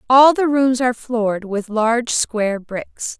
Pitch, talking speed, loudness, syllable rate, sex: 235 Hz, 170 wpm, -18 LUFS, 4.3 syllables/s, female